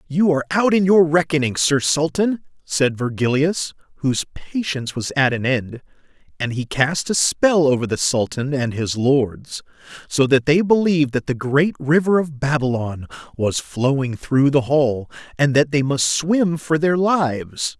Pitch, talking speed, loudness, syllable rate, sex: 145 Hz, 170 wpm, -19 LUFS, 4.4 syllables/s, male